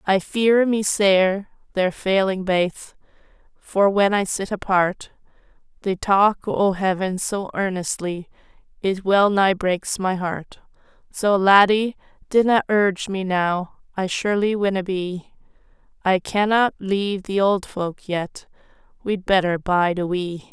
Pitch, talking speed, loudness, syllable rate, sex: 190 Hz, 135 wpm, -20 LUFS, 3.9 syllables/s, female